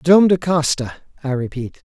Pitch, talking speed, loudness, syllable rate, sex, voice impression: 145 Hz, 125 wpm, -18 LUFS, 4.4 syllables/s, male, very masculine, very adult-like, slightly old, thick, slightly tensed, slightly weak, slightly bright, soft, clear, slightly fluent, slightly raspy, slightly cool, intellectual, refreshing, sincere, calm, slightly friendly, reassuring, slightly unique, slightly elegant, wild, slightly sweet, lively, kind, intense, slightly light